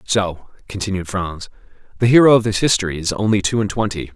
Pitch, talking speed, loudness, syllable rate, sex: 100 Hz, 190 wpm, -17 LUFS, 6.0 syllables/s, male